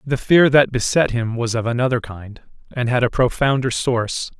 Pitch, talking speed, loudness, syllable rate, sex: 125 Hz, 190 wpm, -18 LUFS, 5.0 syllables/s, male